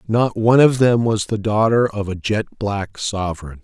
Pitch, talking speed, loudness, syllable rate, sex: 110 Hz, 200 wpm, -18 LUFS, 4.8 syllables/s, male